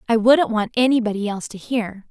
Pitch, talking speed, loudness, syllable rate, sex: 225 Hz, 200 wpm, -19 LUFS, 5.9 syllables/s, female